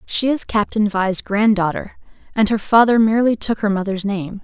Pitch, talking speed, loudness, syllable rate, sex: 210 Hz, 175 wpm, -17 LUFS, 5.1 syllables/s, female